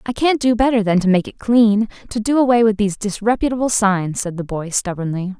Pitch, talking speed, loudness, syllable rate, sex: 215 Hz, 210 wpm, -17 LUFS, 5.7 syllables/s, female